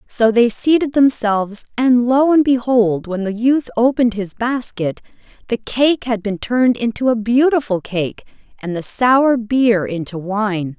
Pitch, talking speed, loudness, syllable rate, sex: 230 Hz, 160 wpm, -16 LUFS, 4.3 syllables/s, female